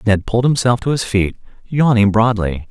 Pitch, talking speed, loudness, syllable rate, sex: 110 Hz, 180 wpm, -16 LUFS, 5.2 syllables/s, male